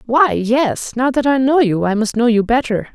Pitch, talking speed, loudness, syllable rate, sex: 240 Hz, 245 wpm, -15 LUFS, 4.6 syllables/s, female